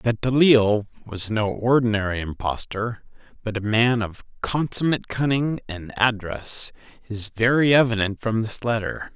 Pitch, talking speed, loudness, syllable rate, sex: 115 Hz, 130 wpm, -22 LUFS, 4.6 syllables/s, male